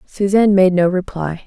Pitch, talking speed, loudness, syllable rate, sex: 185 Hz, 165 wpm, -15 LUFS, 5.1 syllables/s, female